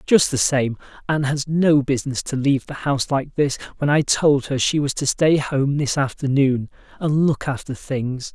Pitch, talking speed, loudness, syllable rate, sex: 140 Hz, 200 wpm, -20 LUFS, 4.9 syllables/s, male